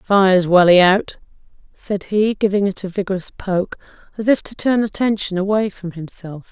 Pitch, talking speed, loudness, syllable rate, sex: 195 Hz, 165 wpm, -17 LUFS, 5.0 syllables/s, female